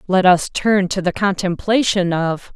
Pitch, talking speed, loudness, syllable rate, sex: 190 Hz, 165 wpm, -17 LUFS, 4.2 syllables/s, female